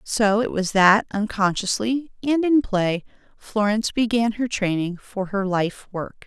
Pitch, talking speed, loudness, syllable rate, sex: 210 Hz, 155 wpm, -22 LUFS, 4.1 syllables/s, female